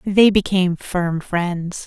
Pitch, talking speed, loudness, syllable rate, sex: 185 Hz, 130 wpm, -19 LUFS, 3.4 syllables/s, female